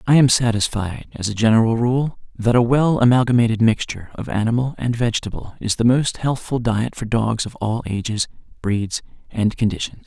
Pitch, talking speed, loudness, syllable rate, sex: 115 Hz, 175 wpm, -19 LUFS, 5.4 syllables/s, male